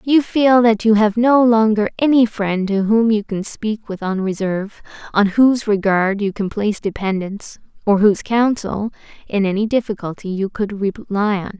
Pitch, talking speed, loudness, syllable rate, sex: 210 Hz, 170 wpm, -17 LUFS, 4.8 syllables/s, female